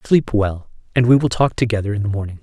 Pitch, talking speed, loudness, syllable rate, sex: 110 Hz, 245 wpm, -18 LUFS, 6.2 syllables/s, male